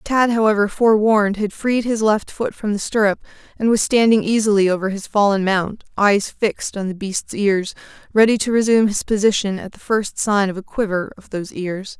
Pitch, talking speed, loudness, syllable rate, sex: 205 Hz, 200 wpm, -18 LUFS, 5.4 syllables/s, female